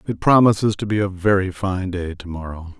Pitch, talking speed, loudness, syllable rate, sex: 95 Hz, 215 wpm, -19 LUFS, 5.5 syllables/s, male